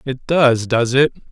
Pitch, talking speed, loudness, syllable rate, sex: 130 Hz, 185 wpm, -16 LUFS, 4.4 syllables/s, male